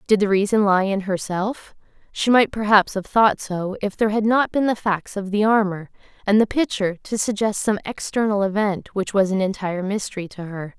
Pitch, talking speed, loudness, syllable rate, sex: 205 Hz, 205 wpm, -21 LUFS, 5.3 syllables/s, female